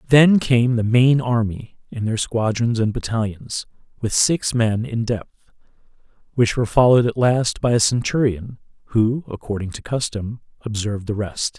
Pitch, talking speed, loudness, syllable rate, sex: 115 Hz, 155 wpm, -20 LUFS, 4.7 syllables/s, male